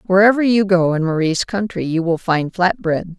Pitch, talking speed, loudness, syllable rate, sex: 180 Hz, 205 wpm, -17 LUFS, 5.0 syllables/s, female